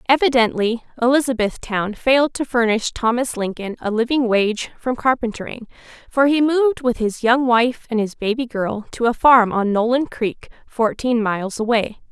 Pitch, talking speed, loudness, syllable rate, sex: 235 Hz, 160 wpm, -19 LUFS, 4.8 syllables/s, female